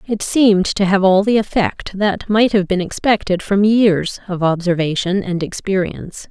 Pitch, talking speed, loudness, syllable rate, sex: 195 Hz, 170 wpm, -16 LUFS, 4.6 syllables/s, female